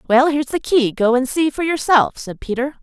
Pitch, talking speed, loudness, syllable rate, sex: 270 Hz, 210 wpm, -17 LUFS, 5.5 syllables/s, female